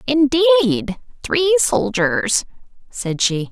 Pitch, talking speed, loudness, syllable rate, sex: 255 Hz, 85 wpm, -17 LUFS, 3.6 syllables/s, female